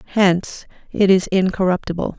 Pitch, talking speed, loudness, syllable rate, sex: 185 Hz, 110 wpm, -18 LUFS, 5.7 syllables/s, female